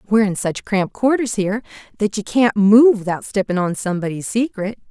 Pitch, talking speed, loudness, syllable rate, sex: 210 Hz, 185 wpm, -18 LUFS, 5.9 syllables/s, female